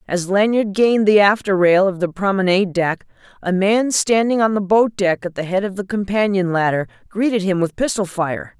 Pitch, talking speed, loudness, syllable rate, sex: 195 Hz, 200 wpm, -17 LUFS, 5.2 syllables/s, female